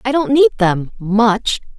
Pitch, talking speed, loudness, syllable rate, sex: 230 Hz, 135 wpm, -15 LUFS, 3.7 syllables/s, female